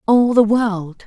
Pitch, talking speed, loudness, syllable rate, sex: 215 Hz, 170 wpm, -15 LUFS, 3.4 syllables/s, female